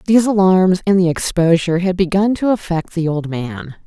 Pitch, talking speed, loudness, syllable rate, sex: 180 Hz, 185 wpm, -16 LUFS, 5.3 syllables/s, female